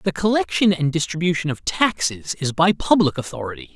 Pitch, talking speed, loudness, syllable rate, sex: 165 Hz, 160 wpm, -20 LUFS, 5.5 syllables/s, male